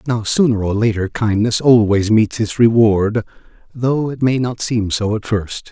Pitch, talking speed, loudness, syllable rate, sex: 110 Hz, 180 wpm, -16 LUFS, 4.4 syllables/s, male